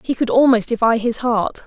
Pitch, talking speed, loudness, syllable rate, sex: 250 Hz, 215 wpm, -17 LUFS, 5.1 syllables/s, female